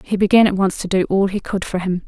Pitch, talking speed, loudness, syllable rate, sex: 190 Hz, 320 wpm, -17 LUFS, 6.2 syllables/s, female